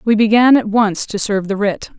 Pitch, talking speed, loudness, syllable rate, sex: 210 Hz, 240 wpm, -14 LUFS, 5.4 syllables/s, female